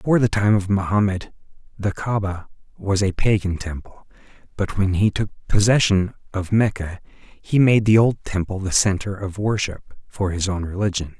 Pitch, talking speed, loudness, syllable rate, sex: 100 Hz, 170 wpm, -21 LUFS, 5.2 syllables/s, male